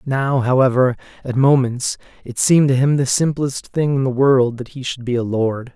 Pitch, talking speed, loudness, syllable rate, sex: 130 Hz, 210 wpm, -17 LUFS, 4.9 syllables/s, male